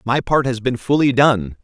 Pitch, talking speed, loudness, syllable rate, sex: 125 Hz, 220 wpm, -17 LUFS, 4.7 syllables/s, male